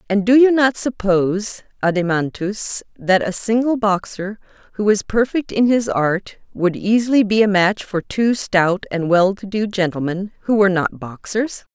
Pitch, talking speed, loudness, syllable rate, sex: 200 Hz, 170 wpm, -18 LUFS, 4.5 syllables/s, female